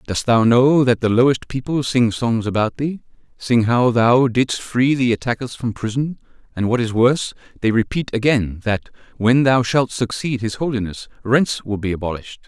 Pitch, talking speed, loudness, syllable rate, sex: 120 Hz, 180 wpm, -18 LUFS, 5.0 syllables/s, male